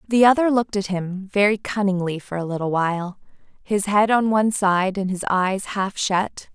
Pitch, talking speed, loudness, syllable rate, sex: 195 Hz, 195 wpm, -21 LUFS, 5.0 syllables/s, female